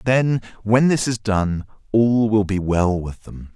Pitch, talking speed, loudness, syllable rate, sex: 105 Hz, 185 wpm, -19 LUFS, 3.8 syllables/s, male